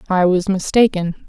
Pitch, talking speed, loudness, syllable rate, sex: 190 Hz, 140 wpm, -16 LUFS, 4.7 syllables/s, female